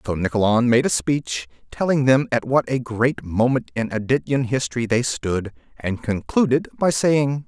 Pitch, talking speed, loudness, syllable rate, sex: 120 Hz, 170 wpm, -21 LUFS, 4.7 syllables/s, male